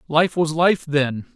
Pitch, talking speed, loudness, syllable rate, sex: 155 Hz, 175 wpm, -19 LUFS, 3.6 syllables/s, male